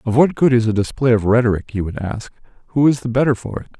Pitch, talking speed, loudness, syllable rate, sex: 120 Hz, 270 wpm, -17 LUFS, 6.7 syllables/s, male